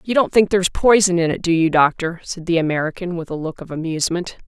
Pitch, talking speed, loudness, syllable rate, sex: 175 Hz, 240 wpm, -18 LUFS, 6.3 syllables/s, female